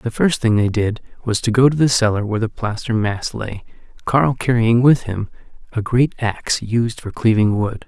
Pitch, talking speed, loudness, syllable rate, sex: 115 Hz, 205 wpm, -18 LUFS, 4.9 syllables/s, male